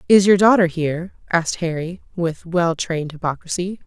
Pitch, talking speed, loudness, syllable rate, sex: 175 Hz, 155 wpm, -19 LUFS, 5.4 syllables/s, female